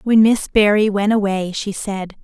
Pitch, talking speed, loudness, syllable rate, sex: 205 Hz, 190 wpm, -17 LUFS, 4.6 syllables/s, female